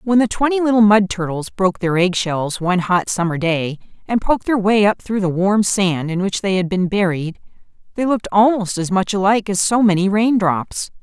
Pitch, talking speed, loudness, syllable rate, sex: 195 Hz, 210 wpm, -17 LUFS, 5.3 syllables/s, female